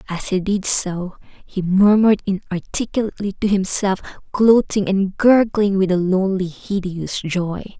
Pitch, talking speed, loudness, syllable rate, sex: 195 Hz, 130 wpm, -18 LUFS, 4.5 syllables/s, female